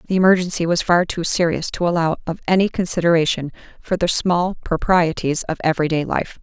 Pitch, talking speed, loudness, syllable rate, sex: 170 Hz, 175 wpm, -19 LUFS, 5.8 syllables/s, female